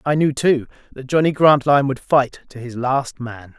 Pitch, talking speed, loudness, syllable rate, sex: 135 Hz, 200 wpm, -18 LUFS, 4.8 syllables/s, male